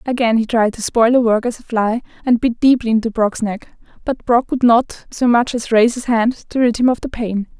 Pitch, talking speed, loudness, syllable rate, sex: 235 Hz, 255 wpm, -16 LUFS, 5.2 syllables/s, female